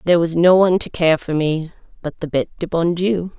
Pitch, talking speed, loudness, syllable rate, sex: 170 Hz, 250 wpm, -17 LUFS, 6.0 syllables/s, female